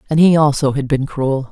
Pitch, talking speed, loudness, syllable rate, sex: 145 Hz, 240 wpm, -15 LUFS, 5.4 syllables/s, female